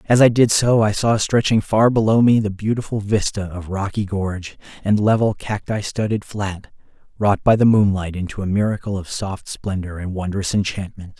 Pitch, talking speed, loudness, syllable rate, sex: 100 Hz, 180 wpm, -19 LUFS, 5.1 syllables/s, male